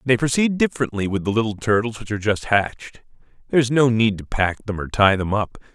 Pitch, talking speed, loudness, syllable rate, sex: 115 Hz, 230 wpm, -20 LUFS, 6.2 syllables/s, male